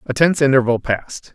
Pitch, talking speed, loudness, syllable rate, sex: 130 Hz, 180 wpm, -17 LUFS, 6.5 syllables/s, male